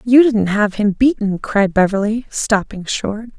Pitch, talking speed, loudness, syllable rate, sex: 215 Hz, 160 wpm, -16 LUFS, 4.1 syllables/s, female